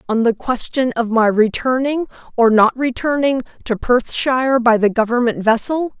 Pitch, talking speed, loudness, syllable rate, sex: 245 Hz, 150 wpm, -16 LUFS, 4.8 syllables/s, female